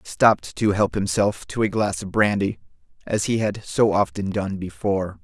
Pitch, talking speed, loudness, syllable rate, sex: 100 Hz, 195 wpm, -22 LUFS, 5.0 syllables/s, male